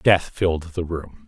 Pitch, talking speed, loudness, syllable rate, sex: 85 Hz, 190 wpm, -23 LUFS, 4.1 syllables/s, male